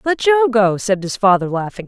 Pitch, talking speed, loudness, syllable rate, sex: 220 Hz, 225 wpm, -16 LUFS, 5.0 syllables/s, female